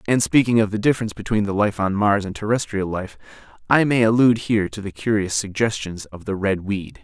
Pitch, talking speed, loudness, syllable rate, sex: 105 Hz, 215 wpm, -20 LUFS, 6.0 syllables/s, male